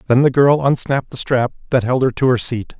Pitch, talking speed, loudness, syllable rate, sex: 130 Hz, 260 wpm, -16 LUFS, 5.9 syllables/s, male